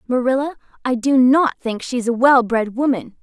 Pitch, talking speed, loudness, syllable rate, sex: 255 Hz, 205 wpm, -17 LUFS, 5.2 syllables/s, female